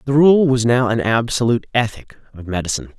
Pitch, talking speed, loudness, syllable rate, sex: 120 Hz, 180 wpm, -17 LUFS, 6.2 syllables/s, male